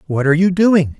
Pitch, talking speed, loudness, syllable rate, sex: 170 Hz, 240 wpm, -14 LUFS, 6.0 syllables/s, male